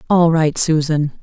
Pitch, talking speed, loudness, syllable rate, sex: 160 Hz, 145 wpm, -15 LUFS, 3.9 syllables/s, female